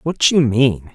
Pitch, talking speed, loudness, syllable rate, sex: 130 Hz, 190 wpm, -15 LUFS, 3.3 syllables/s, male